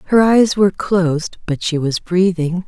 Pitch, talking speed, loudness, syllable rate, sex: 180 Hz, 180 wpm, -16 LUFS, 4.7 syllables/s, female